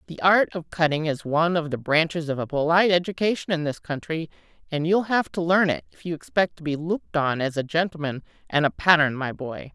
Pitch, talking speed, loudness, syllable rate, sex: 160 Hz, 230 wpm, -23 LUFS, 5.9 syllables/s, female